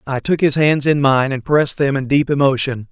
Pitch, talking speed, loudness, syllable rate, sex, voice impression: 140 Hz, 245 wpm, -16 LUFS, 5.4 syllables/s, male, masculine, middle-aged, thick, tensed, powerful, bright, slightly soft, very clear, very fluent, raspy, cool, very intellectual, refreshing, sincere, slightly calm, mature, very friendly, very reassuring, unique, slightly elegant, wild, slightly sweet, very lively, kind, slightly intense, slightly light